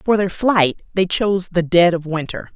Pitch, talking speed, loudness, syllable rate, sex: 180 Hz, 210 wpm, -17 LUFS, 4.8 syllables/s, female